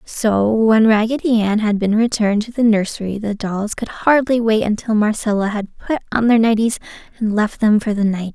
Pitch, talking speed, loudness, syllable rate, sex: 215 Hz, 200 wpm, -17 LUFS, 5.2 syllables/s, female